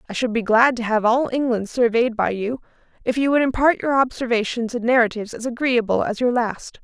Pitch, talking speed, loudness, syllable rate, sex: 240 Hz, 210 wpm, -20 LUFS, 5.6 syllables/s, female